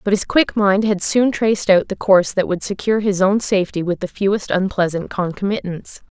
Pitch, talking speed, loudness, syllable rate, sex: 195 Hz, 205 wpm, -18 LUFS, 5.5 syllables/s, female